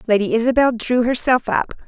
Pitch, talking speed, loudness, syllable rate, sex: 240 Hz, 160 wpm, -18 LUFS, 5.6 syllables/s, female